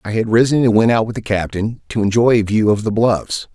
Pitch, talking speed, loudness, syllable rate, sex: 110 Hz, 270 wpm, -16 LUFS, 5.7 syllables/s, male